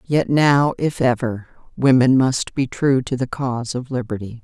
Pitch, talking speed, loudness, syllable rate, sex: 130 Hz, 175 wpm, -19 LUFS, 4.5 syllables/s, female